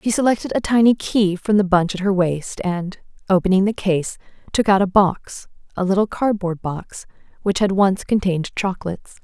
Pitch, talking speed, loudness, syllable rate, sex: 195 Hz, 180 wpm, -19 LUFS, 5.1 syllables/s, female